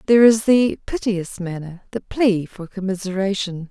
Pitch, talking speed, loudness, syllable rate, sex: 200 Hz, 130 wpm, -20 LUFS, 4.7 syllables/s, female